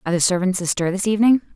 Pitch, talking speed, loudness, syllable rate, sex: 190 Hz, 230 wpm, -19 LUFS, 8.3 syllables/s, female